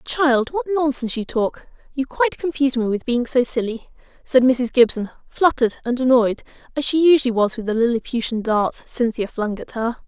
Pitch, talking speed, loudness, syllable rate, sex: 250 Hz, 185 wpm, -20 LUFS, 5.4 syllables/s, female